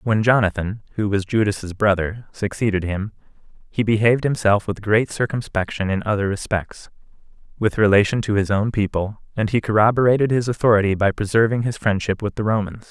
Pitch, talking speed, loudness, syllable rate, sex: 105 Hz, 165 wpm, -20 LUFS, 5.6 syllables/s, male